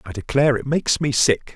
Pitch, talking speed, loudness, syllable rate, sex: 130 Hz, 230 wpm, -19 LUFS, 6.2 syllables/s, male